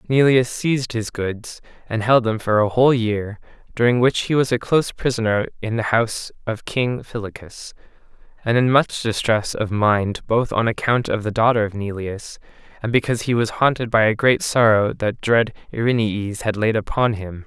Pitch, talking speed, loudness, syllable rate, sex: 115 Hz, 185 wpm, -20 LUFS, 5.0 syllables/s, male